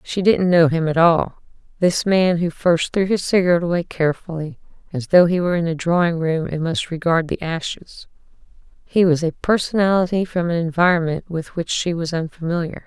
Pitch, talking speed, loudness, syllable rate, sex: 170 Hz, 175 wpm, -19 LUFS, 5.4 syllables/s, female